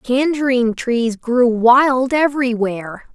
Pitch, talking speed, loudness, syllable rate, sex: 245 Hz, 95 wpm, -16 LUFS, 4.0 syllables/s, female